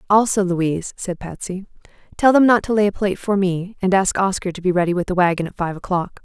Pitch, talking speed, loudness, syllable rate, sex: 190 Hz, 240 wpm, -19 LUFS, 6.1 syllables/s, female